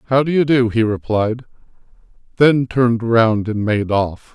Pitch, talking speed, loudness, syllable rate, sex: 115 Hz, 165 wpm, -16 LUFS, 4.7 syllables/s, male